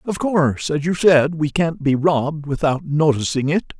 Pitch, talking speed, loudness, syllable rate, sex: 155 Hz, 190 wpm, -18 LUFS, 4.7 syllables/s, male